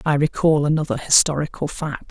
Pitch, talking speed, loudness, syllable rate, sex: 150 Hz, 140 wpm, -19 LUFS, 5.3 syllables/s, male